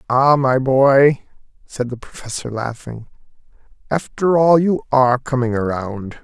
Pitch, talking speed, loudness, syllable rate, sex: 130 Hz, 125 wpm, -17 LUFS, 4.0 syllables/s, male